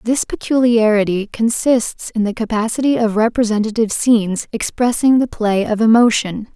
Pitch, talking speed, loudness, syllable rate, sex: 225 Hz, 130 wpm, -16 LUFS, 5.1 syllables/s, female